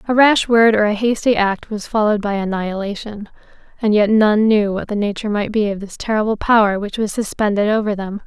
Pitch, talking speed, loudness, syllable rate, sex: 210 Hz, 210 wpm, -17 LUFS, 5.8 syllables/s, female